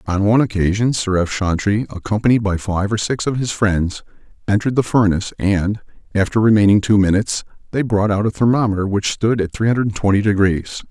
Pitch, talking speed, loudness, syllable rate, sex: 105 Hz, 185 wpm, -17 LUFS, 5.9 syllables/s, male